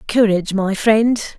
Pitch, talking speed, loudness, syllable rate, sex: 210 Hz, 130 wpm, -16 LUFS, 4.6 syllables/s, female